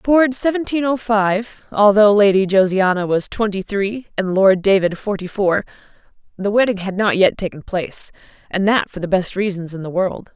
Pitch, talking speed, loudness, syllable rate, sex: 200 Hz, 180 wpm, -17 LUFS, 4.9 syllables/s, female